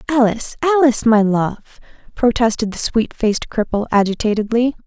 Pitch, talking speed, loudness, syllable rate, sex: 230 Hz, 125 wpm, -17 LUFS, 5.6 syllables/s, female